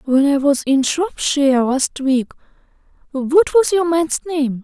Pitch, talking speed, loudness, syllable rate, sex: 290 Hz, 155 wpm, -16 LUFS, 4.0 syllables/s, female